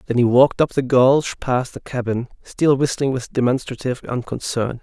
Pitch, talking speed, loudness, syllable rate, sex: 125 Hz, 175 wpm, -19 LUFS, 5.1 syllables/s, male